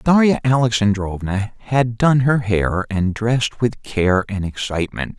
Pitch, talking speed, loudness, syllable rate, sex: 110 Hz, 140 wpm, -18 LUFS, 4.2 syllables/s, male